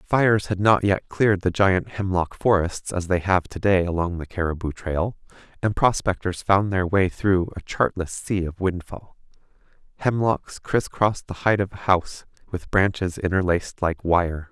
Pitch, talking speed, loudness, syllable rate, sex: 95 Hz, 170 wpm, -23 LUFS, 4.7 syllables/s, male